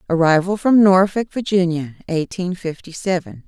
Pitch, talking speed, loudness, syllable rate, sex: 180 Hz, 120 wpm, -18 LUFS, 4.8 syllables/s, female